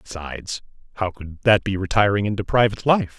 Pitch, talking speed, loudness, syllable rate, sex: 100 Hz, 170 wpm, -21 LUFS, 5.8 syllables/s, male